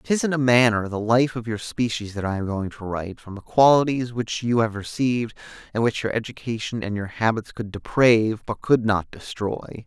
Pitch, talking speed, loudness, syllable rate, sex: 115 Hz, 215 wpm, -23 LUFS, 5.2 syllables/s, male